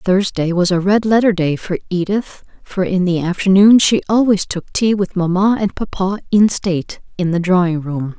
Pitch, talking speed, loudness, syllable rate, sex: 190 Hz, 190 wpm, -15 LUFS, 4.8 syllables/s, female